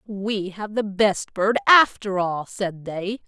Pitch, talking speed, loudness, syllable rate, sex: 200 Hz, 165 wpm, -21 LUFS, 3.3 syllables/s, female